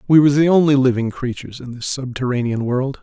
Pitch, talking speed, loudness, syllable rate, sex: 130 Hz, 200 wpm, -17 LUFS, 6.3 syllables/s, male